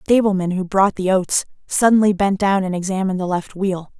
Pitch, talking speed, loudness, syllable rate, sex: 190 Hz, 210 wpm, -18 LUFS, 5.7 syllables/s, female